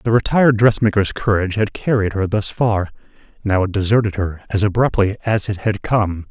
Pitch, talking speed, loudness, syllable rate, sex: 105 Hz, 180 wpm, -18 LUFS, 5.4 syllables/s, male